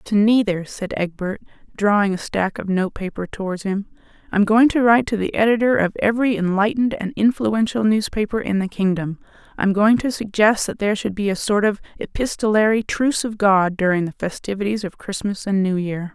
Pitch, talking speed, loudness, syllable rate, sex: 205 Hz, 185 wpm, -20 LUFS, 5.6 syllables/s, female